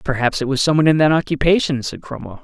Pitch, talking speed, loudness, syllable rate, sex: 145 Hz, 245 wpm, -17 LUFS, 6.9 syllables/s, male